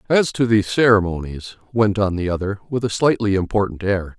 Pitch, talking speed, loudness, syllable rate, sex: 100 Hz, 185 wpm, -19 LUFS, 5.3 syllables/s, male